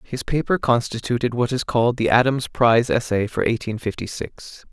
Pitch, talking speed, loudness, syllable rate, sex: 120 Hz, 180 wpm, -21 LUFS, 5.3 syllables/s, male